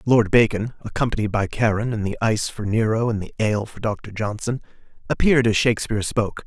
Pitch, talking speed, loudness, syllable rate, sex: 110 Hz, 185 wpm, -22 LUFS, 6.3 syllables/s, male